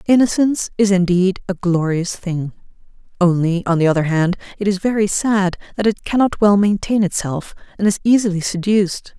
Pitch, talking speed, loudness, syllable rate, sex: 195 Hz, 165 wpm, -17 LUFS, 5.3 syllables/s, female